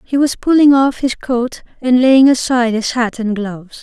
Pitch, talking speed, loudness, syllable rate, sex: 250 Hz, 205 wpm, -14 LUFS, 4.8 syllables/s, female